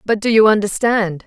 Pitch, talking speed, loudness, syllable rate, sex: 210 Hz, 190 wpm, -15 LUFS, 5.2 syllables/s, female